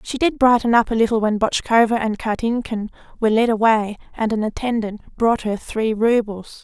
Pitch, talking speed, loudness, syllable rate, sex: 225 Hz, 180 wpm, -19 LUFS, 5.1 syllables/s, female